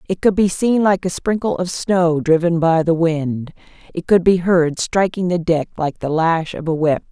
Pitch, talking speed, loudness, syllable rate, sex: 170 Hz, 220 wpm, -17 LUFS, 4.5 syllables/s, female